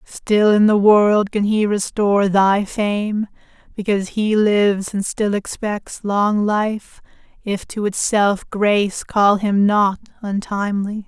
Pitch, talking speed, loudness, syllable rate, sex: 205 Hz, 135 wpm, -18 LUFS, 3.7 syllables/s, female